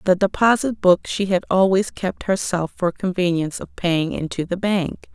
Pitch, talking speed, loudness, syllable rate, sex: 185 Hz, 175 wpm, -20 LUFS, 4.7 syllables/s, female